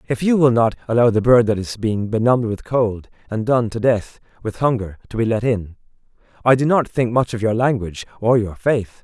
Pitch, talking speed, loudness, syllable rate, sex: 115 Hz, 225 wpm, -18 LUFS, 5.4 syllables/s, male